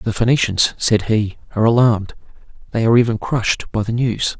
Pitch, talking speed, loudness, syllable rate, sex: 110 Hz, 180 wpm, -17 LUFS, 6.0 syllables/s, male